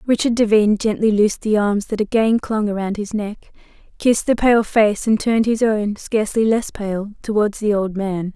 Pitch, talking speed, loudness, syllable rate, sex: 215 Hz, 180 wpm, -18 LUFS, 5.1 syllables/s, female